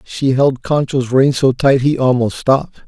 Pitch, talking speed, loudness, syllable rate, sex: 130 Hz, 190 wpm, -14 LUFS, 4.4 syllables/s, male